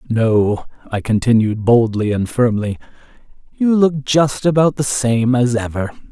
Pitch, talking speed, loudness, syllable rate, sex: 120 Hz, 135 wpm, -16 LUFS, 4.2 syllables/s, male